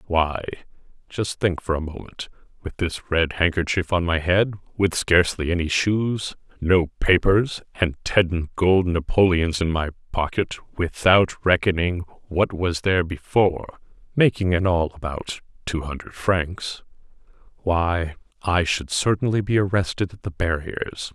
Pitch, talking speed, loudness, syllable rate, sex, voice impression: 90 Hz, 130 wpm, -22 LUFS, 4.3 syllables/s, male, very masculine, very adult-like, very middle-aged, very thick, very tensed, very powerful, bright, hard, muffled, fluent, very cool, intellectual, sincere, very calm, very mature, very friendly, very reassuring, very unique, very wild, slightly sweet, lively, kind